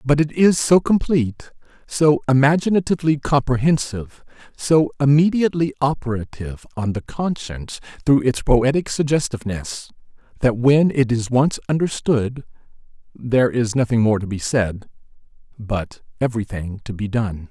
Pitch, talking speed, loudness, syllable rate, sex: 130 Hz, 125 wpm, -19 LUFS, 5.0 syllables/s, male